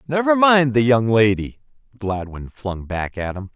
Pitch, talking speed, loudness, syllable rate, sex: 120 Hz, 170 wpm, -19 LUFS, 4.3 syllables/s, male